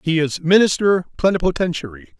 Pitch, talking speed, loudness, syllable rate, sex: 160 Hz, 110 wpm, -18 LUFS, 5.8 syllables/s, male